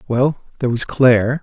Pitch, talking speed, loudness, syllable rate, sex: 125 Hz, 170 wpm, -16 LUFS, 5.6 syllables/s, male